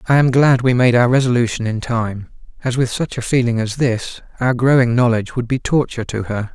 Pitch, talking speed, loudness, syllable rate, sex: 120 Hz, 220 wpm, -17 LUFS, 5.6 syllables/s, male